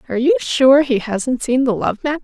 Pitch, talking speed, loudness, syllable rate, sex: 265 Hz, 240 wpm, -16 LUFS, 5.5 syllables/s, female